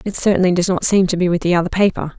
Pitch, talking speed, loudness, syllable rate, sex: 180 Hz, 300 wpm, -16 LUFS, 7.2 syllables/s, female